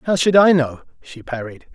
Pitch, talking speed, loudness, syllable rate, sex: 145 Hz, 205 wpm, -16 LUFS, 5.0 syllables/s, male